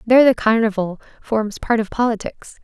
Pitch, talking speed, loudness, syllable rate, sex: 220 Hz, 160 wpm, -18 LUFS, 5.2 syllables/s, female